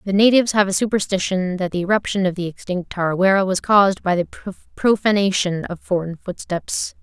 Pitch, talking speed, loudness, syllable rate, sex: 190 Hz, 170 wpm, -19 LUFS, 5.4 syllables/s, female